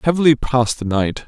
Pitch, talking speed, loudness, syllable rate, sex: 130 Hz, 190 wpm, -17 LUFS, 6.1 syllables/s, male